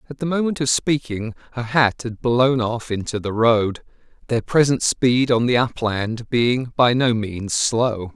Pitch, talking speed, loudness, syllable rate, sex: 120 Hz, 175 wpm, -20 LUFS, 4.0 syllables/s, male